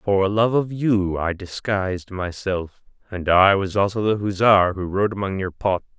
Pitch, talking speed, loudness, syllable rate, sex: 100 Hz, 180 wpm, -21 LUFS, 4.4 syllables/s, male